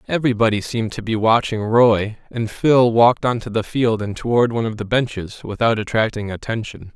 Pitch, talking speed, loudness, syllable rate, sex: 115 Hz, 190 wpm, -19 LUFS, 5.6 syllables/s, male